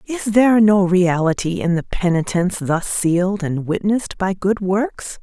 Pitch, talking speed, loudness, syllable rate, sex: 190 Hz, 160 wpm, -18 LUFS, 4.5 syllables/s, female